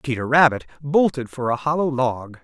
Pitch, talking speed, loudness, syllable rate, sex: 135 Hz, 175 wpm, -20 LUFS, 5.0 syllables/s, male